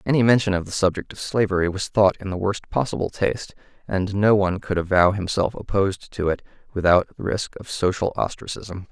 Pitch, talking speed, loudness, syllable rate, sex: 100 Hz, 195 wpm, -22 LUFS, 5.7 syllables/s, male